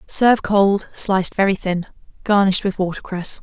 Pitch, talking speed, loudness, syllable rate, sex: 195 Hz, 140 wpm, -18 LUFS, 5.1 syllables/s, female